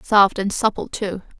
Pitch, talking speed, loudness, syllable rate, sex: 200 Hz, 170 wpm, -20 LUFS, 4.4 syllables/s, female